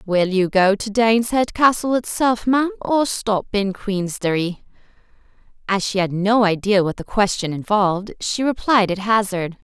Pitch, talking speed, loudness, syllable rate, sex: 210 Hz, 155 wpm, -19 LUFS, 4.6 syllables/s, female